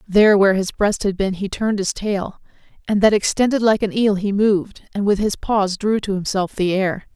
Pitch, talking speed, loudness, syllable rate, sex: 200 Hz, 225 wpm, -18 LUFS, 5.3 syllables/s, female